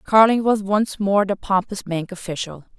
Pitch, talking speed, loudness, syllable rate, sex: 195 Hz, 170 wpm, -20 LUFS, 4.7 syllables/s, female